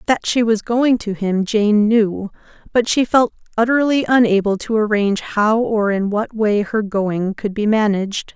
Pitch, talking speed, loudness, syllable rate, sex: 215 Hz, 180 wpm, -17 LUFS, 4.4 syllables/s, female